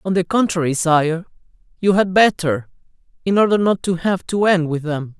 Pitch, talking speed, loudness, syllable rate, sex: 175 Hz, 185 wpm, -18 LUFS, 5.0 syllables/s, male